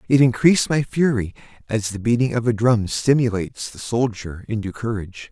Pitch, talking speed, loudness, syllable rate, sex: 115 Hz, 170 wpm, -20 LUFS, 5.5 syllables/s, male